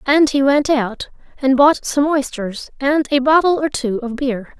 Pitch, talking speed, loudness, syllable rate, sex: 270 Hz, 195 wpm, -17 LUFS, 4.2 syllables/s, female